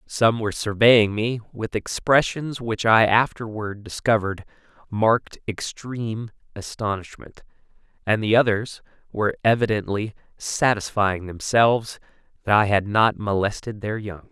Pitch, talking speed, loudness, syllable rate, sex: 110 Hz, 115 wpm, -22 LUFS, 4.6 syllables/s, male